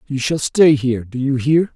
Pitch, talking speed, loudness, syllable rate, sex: 140 Hz, 240 wpm, -16 LUFS, 5.0 syllables/s, male